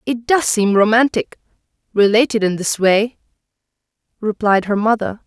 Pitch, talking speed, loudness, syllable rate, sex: 215 Hz, 125 wpm, -16 LUFS, 4.8 syllables/s, female